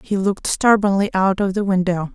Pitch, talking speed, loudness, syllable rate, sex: 195 Hz, 195 wpm, -18 LUFS, 5.5 syllables/s, female